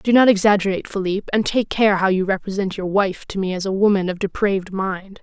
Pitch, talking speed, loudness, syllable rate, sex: 195 Hz, 230 wpm, -19 LUFS, 5.9 syllables/s, female